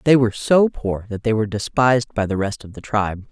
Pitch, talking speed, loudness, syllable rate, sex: 115 Hz, 255 wpm, -19 LUFS, 6.2 syllables/s, female